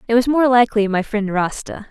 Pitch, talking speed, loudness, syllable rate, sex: 225 Hz, 220 wpm, -17 LUFS, 5.8 syllables/s, female